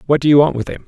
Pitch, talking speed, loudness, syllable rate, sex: 140 Hz, 410 wpm, -13 LUFS, 8.5 syllables/s, male